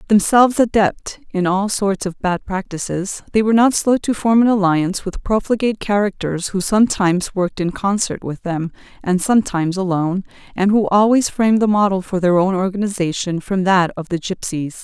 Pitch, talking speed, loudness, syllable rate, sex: 195 Hz, 180 wpm, -17 LUFS, 5.5 syllables/s, female